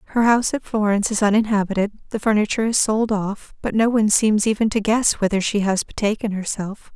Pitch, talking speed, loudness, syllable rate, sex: 210 Hz, 200 wpm, -20 LUFS, 6.1 syllables/s, female